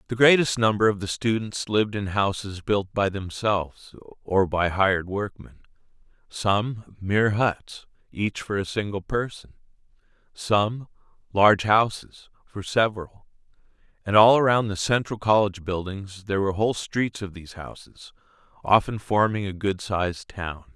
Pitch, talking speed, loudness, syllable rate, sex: 100 Hz, 140 wpm, -23 LUFS, 4.7 syllables/s, male